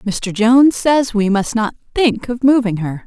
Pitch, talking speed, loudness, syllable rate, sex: 230 Hz, 195 wpm, -15 LUFS, 4.2 syllables/s, female